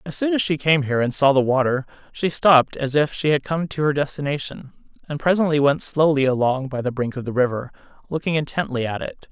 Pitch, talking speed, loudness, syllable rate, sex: 140 Hz, 225 wpm, -20 LUFS, 5.9 syllables/s, male